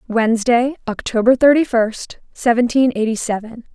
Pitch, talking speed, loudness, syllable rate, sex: 235 Hz, 110 wpm, -16 LUFS, 4.9 syllables/s, female